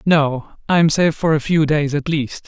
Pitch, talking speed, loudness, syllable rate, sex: 150 Hz, 240 wpm, -17 LUFS, 5.1 syllables/s, male